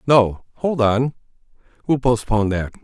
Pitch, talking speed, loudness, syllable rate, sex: 120 Hz, 125 wpm, -19 LUFS, 4.6 syllables/s, male